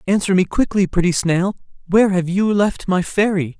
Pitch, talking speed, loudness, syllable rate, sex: 190 Hz, 185 wpm, -17 LUFS, 5.1 syllables/s, male